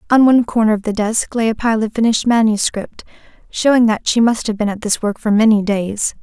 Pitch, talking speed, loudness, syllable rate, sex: 220 Hz, 230 wpm, -15 LUFS, 5.8 syllables/s, female